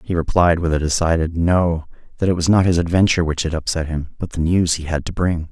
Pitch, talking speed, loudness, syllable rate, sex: 85 Hz, 250 wpm, -18 LUFS, 5.9 syllables/s, male